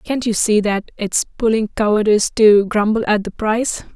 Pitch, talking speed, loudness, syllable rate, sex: 215 Hz, 180 wpm, -16 LUFS, 5.1 syllables/s, female